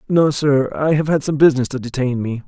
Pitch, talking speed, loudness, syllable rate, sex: 140 Hz, 240 wpm, -17 LUFS, 5.7 syllables/s, male